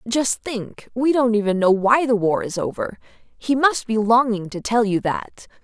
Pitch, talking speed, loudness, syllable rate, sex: 225 Hz, 180 wpm, -20 LUFS, 4.3 syllables/s, female